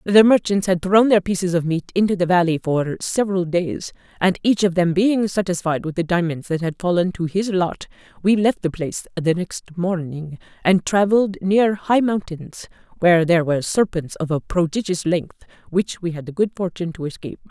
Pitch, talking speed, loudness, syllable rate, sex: 180 Hz, 195 wpm, -20 LUFS, 5.3 syllables/s, female